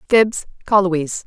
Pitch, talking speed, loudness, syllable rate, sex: 190 Hz, 140 wpm, -17 LUFS, 4.5 syllables/s, female